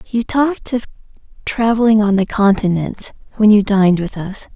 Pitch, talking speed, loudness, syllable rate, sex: 210 Hz, 160 wpm, -15 LUFS, 5.1 syllables/s, female